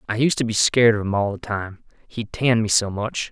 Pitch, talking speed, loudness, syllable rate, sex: 110 Hz, 270 wpm, -20 LUFS, 5.7 syllables/s, male